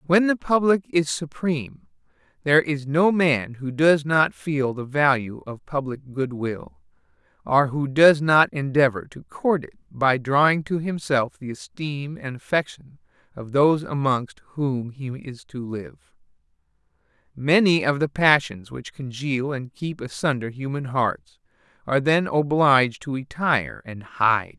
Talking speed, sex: 155 wpm, male